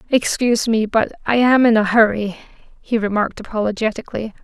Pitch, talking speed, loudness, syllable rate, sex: 220 Hz, 150 wpm, -17 LUFS, 6.1 syllables/s, female